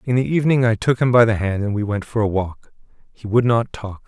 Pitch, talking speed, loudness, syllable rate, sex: 115 Hz, 280 wpm, -19 LUFS, 5.9 syllables/s, male